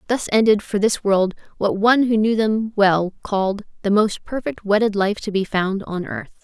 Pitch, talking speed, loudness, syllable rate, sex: 205 Hz, 205 wpm, -19 LUFS, 4.8 syllables/s, female